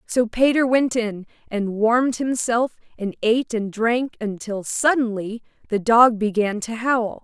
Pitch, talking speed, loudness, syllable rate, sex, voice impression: 230 Hz, 150 wpm, -21 LUFS, 4.1 syllables/s, female, feminine, slightly young, tensed, powerful, bright, soft, slightly muffled, friendly, slightly reassuring, lively